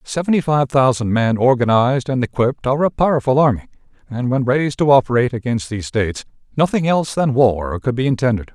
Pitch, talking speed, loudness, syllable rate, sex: 130 Hz, 180 wpm, -17 LUFS, 6.4 syllables/s, male